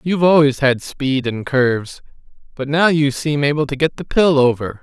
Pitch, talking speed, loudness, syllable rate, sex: 140 Hz, 200 wpm, -16 LUFS, 5.0 syllables/s, male